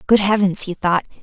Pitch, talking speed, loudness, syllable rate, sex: 195 Hz, 195 wpm, -17 LUFS, 5.4 syllables/s, female